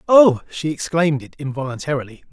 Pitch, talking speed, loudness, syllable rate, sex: 150 Hz, 130 wpm, -19 LUFS, 6.1 syllables/s, male